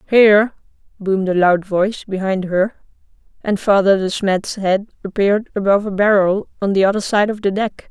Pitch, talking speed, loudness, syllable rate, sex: 200 Hz, 175 wpm, -17 LUFS, 5.4 syllables/s, female